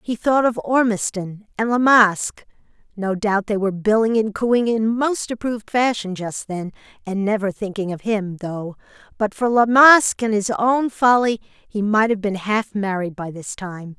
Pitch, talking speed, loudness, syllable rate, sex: 215 Hz, 180 wpm, -19 LUFS, 4.4 syllables/s, female